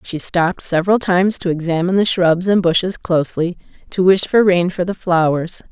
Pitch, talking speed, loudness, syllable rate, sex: 180 Hz, 190 wpm, -16 LUFS, 5.5 syllables/s, female